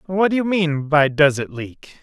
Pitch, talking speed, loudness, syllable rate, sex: 160 Hz, 235 wpm, -18 LUFS, 4.3 syllables/s, male